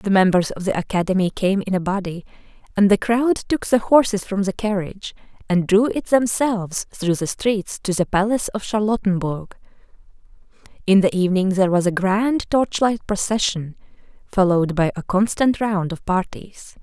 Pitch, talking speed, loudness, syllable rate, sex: 200 Hz, 165 wpm, -20 LUFS, 5.1 syllables/s, female